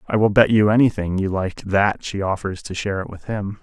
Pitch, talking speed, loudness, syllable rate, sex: 100 Hz, 250 wpm, -20 LUFS, 5.5 syllables/s, male